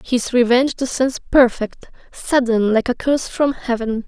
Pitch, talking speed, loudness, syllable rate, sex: 245 Hz, 145 wpm, -18 LUFS, 4.7 syllables/s, female